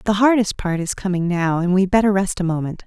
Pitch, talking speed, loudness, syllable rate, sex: 190 Hz, 250 wpm, -19 LUFS, 5.9 syllables/s, female